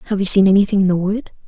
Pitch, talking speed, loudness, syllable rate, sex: 195 Hz, 285 wpm, -15 LUFS, 7.9 syllables/s, female